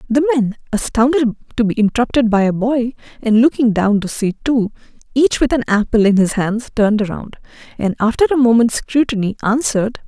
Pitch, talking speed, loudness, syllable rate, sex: 235 Hz, 180 wpm, -16 LUFS, 5.6 syllables/s, female